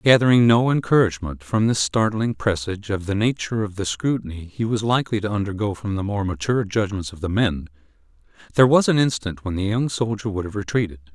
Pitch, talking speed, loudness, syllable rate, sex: 105 Hz, 200 wpm, -21 LUFS, 6.2 syllables/s, male